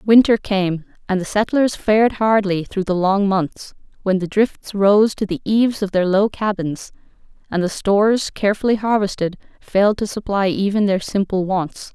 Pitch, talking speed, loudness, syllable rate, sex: 200 Hz, 170 wpm, -18 LUFS, 4.7 syllables/s, female